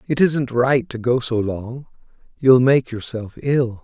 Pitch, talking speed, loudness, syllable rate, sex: 125 Hz, 170 wpm, -19 LUFS, 3.8 syllables/s, male